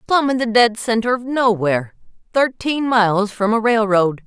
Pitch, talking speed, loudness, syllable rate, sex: 225 Hz, 170 wpm, -17 LUFS, 4.8 syllables/s, female